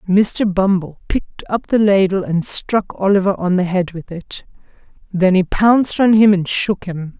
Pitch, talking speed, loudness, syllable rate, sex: 190 Hz, 185 wpm, -16 LUFS, 4.5 syllables/s, female